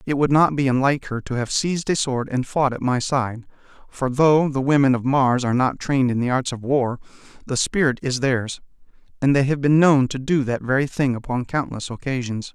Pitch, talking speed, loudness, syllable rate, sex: 135 Hz, 225 wpm, -21 LUFS, 5.4 syllables/s, male